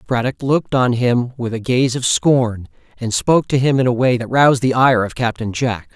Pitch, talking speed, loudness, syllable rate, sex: 125 Hz, 250 wpm, -16 LUFS, 5.3 syllables/s, male